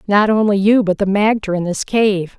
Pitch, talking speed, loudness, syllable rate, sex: 200 Hz, 225 wpm, -15 LUFS, 4.9 syllables/s, female